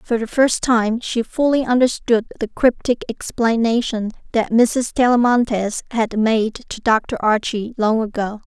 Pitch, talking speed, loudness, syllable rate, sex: 230 Hz, 140 wpm, -18 LUFS, 4.2 syllables/s, female